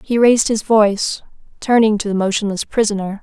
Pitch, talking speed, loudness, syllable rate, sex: 215 Hz, 165 wpm, -16 LUFS, 5.8 syllables/s, female